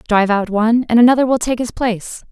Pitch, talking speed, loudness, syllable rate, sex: 230 Hz, 235 wpm, -15 LUFS, 6.6 syllables/s, female